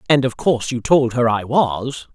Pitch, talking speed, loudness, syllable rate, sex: 125 Hz, 225 wpm, -18 LUFS, 4.7 syllables/s, male